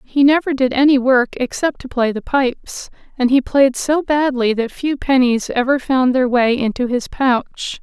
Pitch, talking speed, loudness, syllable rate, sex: 260 Hz, 190 wpm, -16 LUFS, 4.5 syllables/s, female